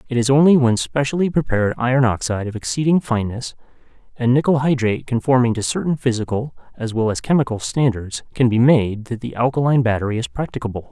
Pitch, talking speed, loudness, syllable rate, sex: 125 Hz, 175 wpm, -19 LUFS, 6.4 syllables/s, male